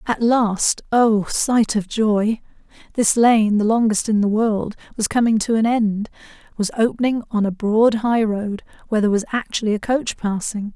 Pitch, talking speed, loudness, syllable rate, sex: 220 Hz, 160 wpm, -19 LUFS, 4.6 syllables/s, female